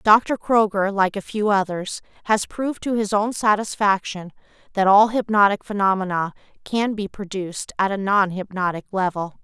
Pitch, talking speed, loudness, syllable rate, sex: 200 Hz, 155 wpm, -21 LUFS, 4.9 syllables/s, female